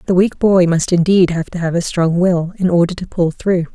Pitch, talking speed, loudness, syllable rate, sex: 175 Hz, 255 wpm, -15 LUFS, 5.1 syllables/s, female